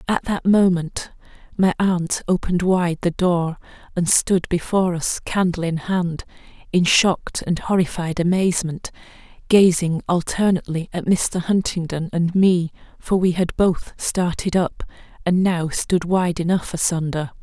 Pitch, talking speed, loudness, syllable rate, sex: 175 Hz, 135 wpm, -20 LUFS, 4.4 syllables/s, female